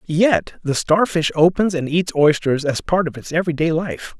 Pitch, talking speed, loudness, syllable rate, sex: 160 Hz, 185 wpm, -18 LUFS, 4.8 syllables/s, male